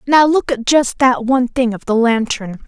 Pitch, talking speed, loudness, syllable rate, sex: 250 Hz, 225 wpm, -15 LUFS, 4.8 syllables/s, female